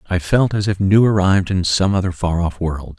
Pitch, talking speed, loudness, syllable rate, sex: 95 Hz, 240 wpm, -17 LUFS, 5.4 syllables/s, male